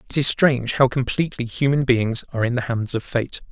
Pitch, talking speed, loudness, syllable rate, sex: 125 Hz, 220 wpm, -20 LUFS, 5.9 syllables/s, male